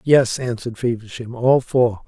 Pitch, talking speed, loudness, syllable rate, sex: 120 Hz, 145 wpm, -19 LUFS, 4.7 syllables/s, male